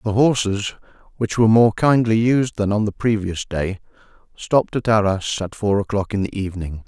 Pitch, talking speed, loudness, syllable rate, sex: 105 Hz, 185 wpm, -19 LUFS, 5.4 syllables/s, male